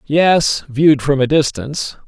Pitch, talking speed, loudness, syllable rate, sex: 145 Hz, 145 wpm, -15 LUFS, 4.4 syllables/s, male